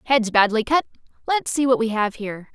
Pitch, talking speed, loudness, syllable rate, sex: 240 Hz, 190 wpm, -21 LUFS, 5.8 syllables/s, female